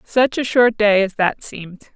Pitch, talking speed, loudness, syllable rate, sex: 215 Hz, 215 wpm, -16 LUFS, 4.4 syllables/s, female